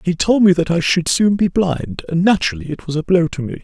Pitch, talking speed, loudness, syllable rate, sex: 170 Hz, 280 wpm, -16 LUFS, 5.7 syllables/s, male